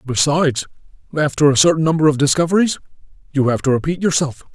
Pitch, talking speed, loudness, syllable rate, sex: 150 Hz, 160 wpm, -16 LUFS, 6.7 syllables/s, male